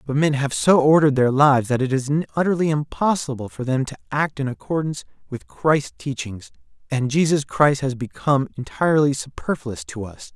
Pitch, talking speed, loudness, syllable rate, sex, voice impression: 140 Hz, 175 wpm, -21 LUFS, 5.6 syllables/s, male, masculine, adult-like, slightly fluent, cool, slightly refreshing